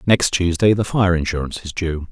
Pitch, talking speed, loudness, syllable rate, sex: 90 Hz, 200 wpm, -19 LUFS, 5.7 syllables/s, male